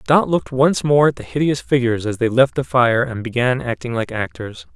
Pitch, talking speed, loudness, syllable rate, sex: 125 Hz, 225 wpm, -18 LUFS, 5.5 syllables/s, male